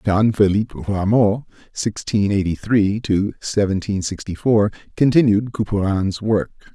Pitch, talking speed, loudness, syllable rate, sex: 105 Hz, 115 wpm, -19 LUFS, 2.9 syllables/s, male